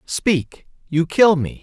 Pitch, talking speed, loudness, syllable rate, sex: 170 Hz, 145 wpm, -18 LUFS, 3.1 syllables/s, male